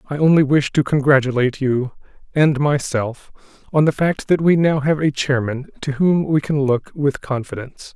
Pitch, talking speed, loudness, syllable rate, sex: 140 Hz, 180 wpm, -18 LUFS, 4.9 syllables/s, male